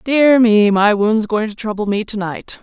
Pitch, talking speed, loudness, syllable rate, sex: 215 Hz, 230 wpm, -15 LUFS, 4.4 syllables/s, female